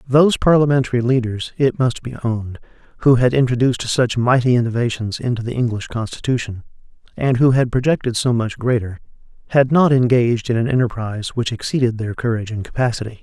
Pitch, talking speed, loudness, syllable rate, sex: 120 Hz, 165 wpm, -18 LUFS, 6.1 syllables/s, male